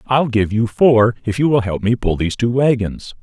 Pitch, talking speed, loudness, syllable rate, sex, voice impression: 115 Hz, 240 wpm, -16 LUFS, 5.0 syllables/s, male, masculine, adult-like, tensed, slightly powerful, bright, soft, fluent, cool, intellectual, refreshing, sincere, calm, friendly, slightly reassuring, slightly unique, lively, kind